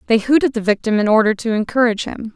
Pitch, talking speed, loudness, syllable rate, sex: 225 Hz, 255 wpm, -17 LUFS, 6.9 syllables/s, female